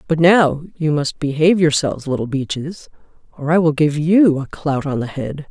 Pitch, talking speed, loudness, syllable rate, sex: 155 Hz, 195 wpm, -17 LUFS, 5.1 syllables/s, female